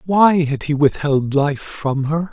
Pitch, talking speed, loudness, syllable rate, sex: 150 Hz, 180 wpm, -17 LUFS, 3.7 syllables/s, male